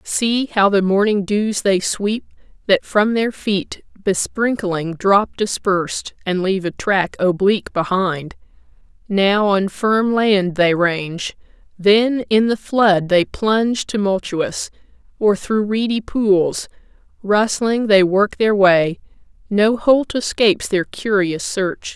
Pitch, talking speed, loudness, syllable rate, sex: 200 Hz, 130 wpm, -17 LUFS, 3.6 syllables/s, female